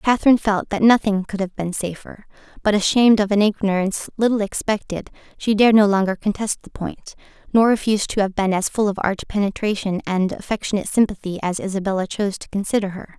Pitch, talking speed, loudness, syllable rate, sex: 200 Hz, 185 wpm, -20 LUFS, 6.3 syllables/s, female